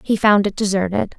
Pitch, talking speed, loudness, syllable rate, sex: 205 Hz, 205 wpm, -17 LUFS, 5.6 syllables/s, female